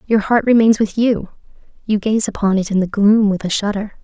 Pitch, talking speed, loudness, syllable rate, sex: 210 Hz, 225 wpm, -16 LUFS, 5.5 syllables/s, female